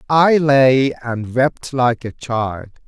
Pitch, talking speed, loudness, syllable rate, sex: 130 Hz, 145 wpm, -16 LUFS, 2.9 syllables/s, male